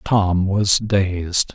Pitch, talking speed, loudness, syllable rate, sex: 95 Hz, 115 wpm, -18 LUFS, 2.1 syllables/s, male